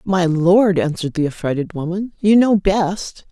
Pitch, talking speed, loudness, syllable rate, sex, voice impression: 180 Hz, 165 wpm, -17 LUFS, 4.4 syllables/s, female, very feminine, very adult-like, very middle-aged, slightly thin, tensed, very powerful, bright, hard, very clear, fluent, cool, slightly intellectual, slightly sincere, slightly calm, slightly friendly, slightly reassuring, unique, very wild, very lively, intense, slightly sharp